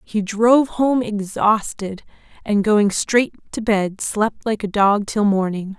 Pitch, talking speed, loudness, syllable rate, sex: 210 Hz, 155 wpm, -19 LUFS, 3.7 syllables/s, female